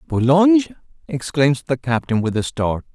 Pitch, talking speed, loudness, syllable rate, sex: 145 Hz, 145 wpm, -18 LUFS, 4.9 syllables/s, male